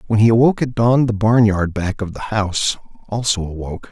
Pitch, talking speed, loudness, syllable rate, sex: 105 Hz, 200 wpm, -17 LUFS, 5.8 syllables/s, male